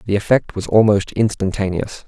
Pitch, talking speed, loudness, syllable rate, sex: 105 Hz, 145 wpm, -17 LUFS, 5.2 syllables/s, male